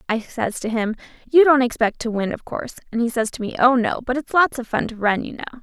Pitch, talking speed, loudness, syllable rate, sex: 240 Hz, 290 wpm, -20 LUFS, 6.1 syllables/s, female